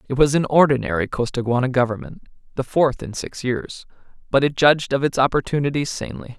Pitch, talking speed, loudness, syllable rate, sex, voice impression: 135 Hz, 150 wpm, -20 LUFS, 6.0 syllables/s, male, masculine, adult-like, tensed, powerful, bright, clear, cool, intellectual, slightly mature, friendly, wild, lively, slightly kind